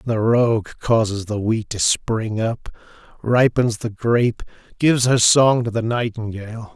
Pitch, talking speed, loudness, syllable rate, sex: 115 Hz, 150 wpm, -19 LUFS, 4.4 syllables/s, male